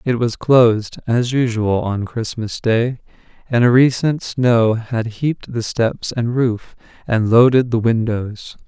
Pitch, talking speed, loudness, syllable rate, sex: 120 Hz, 150 wpm, -17 LUFS, 3.8 syllables/s, male